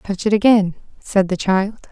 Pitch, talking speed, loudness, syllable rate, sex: 200 Hz, 190 wpm, -17 LUFS, 4.2 syllables/s, female